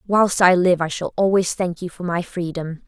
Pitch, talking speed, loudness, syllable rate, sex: 180 Hz, 230 wpm, -20 LUFS, 4.8 syllables/s, female